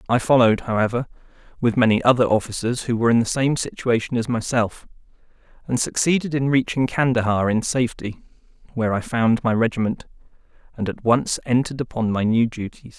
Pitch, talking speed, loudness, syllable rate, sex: 120 Hz, 160 wpm, -21 LUFS, 6.0 syllables/s, male